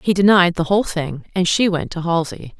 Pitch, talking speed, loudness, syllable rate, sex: 175 Hz, 230 wpm, -18 LUFS, 5.5 syllables/s, female